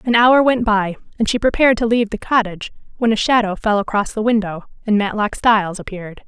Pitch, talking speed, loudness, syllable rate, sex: 215 Hz, 210 wpm, -17 LUFS, 6.1 syllables/s, female